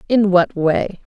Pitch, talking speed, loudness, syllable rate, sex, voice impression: 190 Hz, 155 wpm, -16 LUFS, 3.5 syllables/s, female, feminine, adult-like, tensed, slightly bright, clear, slightly halting, friendly, reassuring, lively, kind, modest